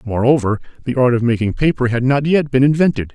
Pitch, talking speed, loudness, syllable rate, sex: 130 Hz, 210 wpm, -16 LUFS, 6.1 syllables/s, male